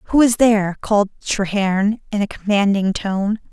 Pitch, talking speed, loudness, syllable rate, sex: 205 Hz, 155 wpm, -18 LUFS, 4.8 syllables/s, female